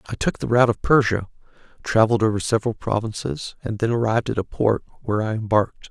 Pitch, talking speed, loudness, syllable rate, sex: 110 Hz, 195 wpm, -21 LUFS, 6.7 syllables/s, male